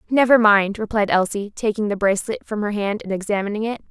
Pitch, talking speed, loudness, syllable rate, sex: 210 Hz, 200 wpm, -20 LUFS, 6.2 syllables/s, female